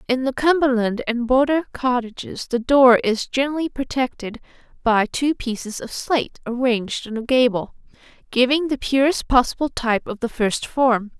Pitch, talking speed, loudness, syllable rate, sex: 250 Hz, 155 wpm, -20 LUFS, 5.0 syllables/s, female